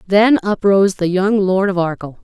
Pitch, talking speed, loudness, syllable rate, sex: 190 Hz, 190 wpm, -15 LUFS, 4.9 syllables/s, female